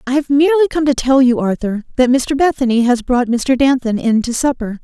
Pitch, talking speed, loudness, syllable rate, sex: 255 Hz, 225 wpm, -14 LUFS, 5.5 syllables/s, female